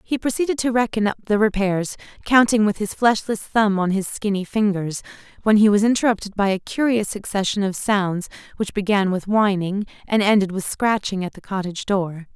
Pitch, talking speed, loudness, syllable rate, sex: 205 Hz, 185 wpm, -20 LUFS, 5.3 syllables/s, female